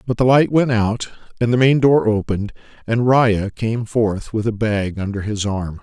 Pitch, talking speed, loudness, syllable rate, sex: 110 Hz, 205 wpm, -18 LUFS, 4.6 syllables/s, male